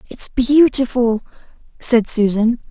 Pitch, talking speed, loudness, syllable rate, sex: 240 Hz, 90 wpm, -16 LUFS, 3.6 syllables/s, female